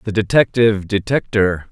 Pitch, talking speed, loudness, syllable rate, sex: 105 Hz, 105 wpm, -16 LUFS, 5.1 syllables/s, male